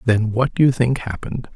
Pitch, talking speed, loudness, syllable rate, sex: 120 Hz, 230 wpm, -19 LUFS, 5.8 syllables/s, male